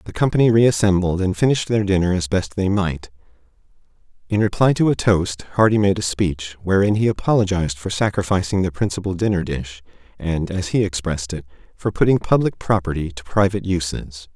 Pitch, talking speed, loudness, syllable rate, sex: 95 Hz, 170 wpm, -19 LUFS, 5.7 syllables/s, male